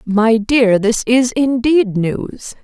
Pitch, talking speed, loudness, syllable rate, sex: 230 Hz, 135 wpm, -14 LUFS, 2.9 syllables/s, female